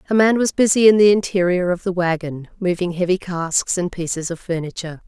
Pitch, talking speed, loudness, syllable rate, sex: 180 Hz, 200 wpm, -18 LUFS, 5.7 syllables/s, female